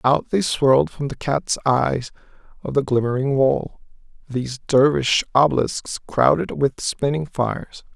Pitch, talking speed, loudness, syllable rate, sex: 135 Hz, 135 wpm, -20 LUFS, 4.4 syllables/s, male